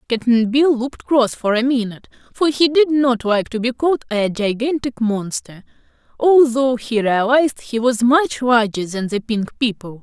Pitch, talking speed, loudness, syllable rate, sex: 240 Hz, 175 wpm, -17 LUFS, 4.6 syllables/s, female